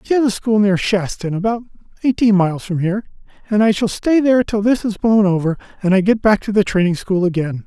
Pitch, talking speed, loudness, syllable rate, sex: 200 Hz, 225 wpm, -17 LUFS, 6.0 syllables/s, male